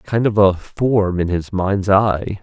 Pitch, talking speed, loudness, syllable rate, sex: 100 Hz, 200 wpm, -17 LUFS, 3.4 syllables/s, male